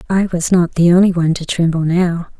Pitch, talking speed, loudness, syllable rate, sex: 175 Hz, 225 wpm, -14 LUFS, 5.9 syllables/s, female